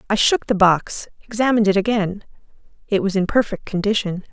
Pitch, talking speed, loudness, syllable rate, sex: 205 Hz, 165 wpm, -19 LUFS, 5.8 syllables/s, female